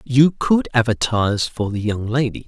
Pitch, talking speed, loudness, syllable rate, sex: 120 Hz, 170 wpm, -19 LUFS, 4.7 syllables/s, male